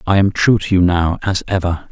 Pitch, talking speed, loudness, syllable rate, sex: 95 Hz, 220 wpm, -15 LUFS, 5.3 syllables/s, male